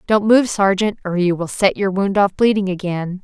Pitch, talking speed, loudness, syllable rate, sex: 195 Hz, 220 wpm, -17 LUFS, 5.0 syllables/s, female